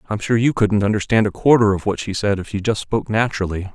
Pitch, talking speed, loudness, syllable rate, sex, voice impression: 105 Hz, 255 wpm, -18 LUFS, 6.5 syllables/s, male, masculine, very adult-like, middle-aged, very thick, slightly tensed, slightly weak, slightly dark, slightly hard, slightly muffled, fluent, cool, very intellectual, slightly refreshing, very sincere, very calm, mature, friendly, reassuring, slightly unique, elegant, slightly wild, very sweet, lively, kind, slightly modest